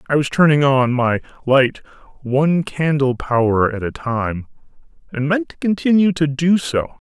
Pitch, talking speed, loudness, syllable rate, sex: 140 Hz, 160 wpm, -17 LUFS, 4.7 syllables/s, male